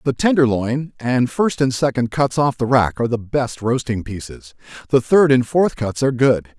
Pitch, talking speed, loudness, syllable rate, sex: 130 Hz, 200 wpm, -18 LUFS, 4.8 syllables/s, male